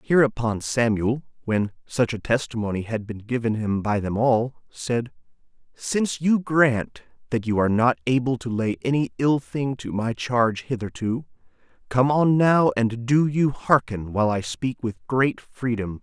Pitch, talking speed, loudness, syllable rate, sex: 120 Hz, 170 wpm, -23 LUFS, 4.5 syllables/s, male